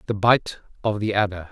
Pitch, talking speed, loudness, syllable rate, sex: 100 Hz, 200 wpm, -22 LUFS, 5.5 syllables/s, male